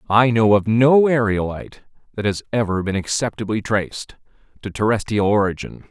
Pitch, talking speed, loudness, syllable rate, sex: 110 Hz, 140 wpm, -19 LUFS, 5.4 syllables/s, male